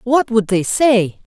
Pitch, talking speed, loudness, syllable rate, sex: 225 Hz, 180 wpm, -16 LUFS, 3.5 syllables/s, female